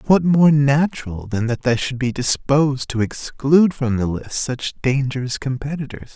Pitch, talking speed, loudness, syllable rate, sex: 135 Hz, 165 wpm, -19 LUFS, 4.6 syllables/s, male